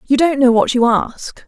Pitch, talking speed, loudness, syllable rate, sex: 260 Hz, 245 wpm, -14 LUFS, 4.5 syllables/s, female